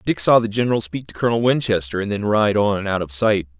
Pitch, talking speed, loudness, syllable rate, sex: 105 Hz, 265 wpm, -19 LUFS, 6.5 syllables/s, male